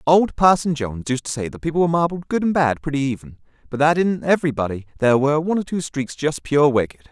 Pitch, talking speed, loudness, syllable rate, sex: 145 Hz, 235 wpm, -20 LUFS, 6.7 syllables/s, male